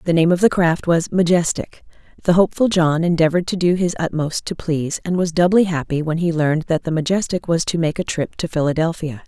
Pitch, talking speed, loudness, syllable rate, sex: 170 Hz, 220 wpm, -18 LUFS, 5.9 syllables/s, female